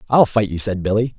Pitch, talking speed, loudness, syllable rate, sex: 105 Hz, 255 wpm, -18 LUFS, 6.0 syllables/s, male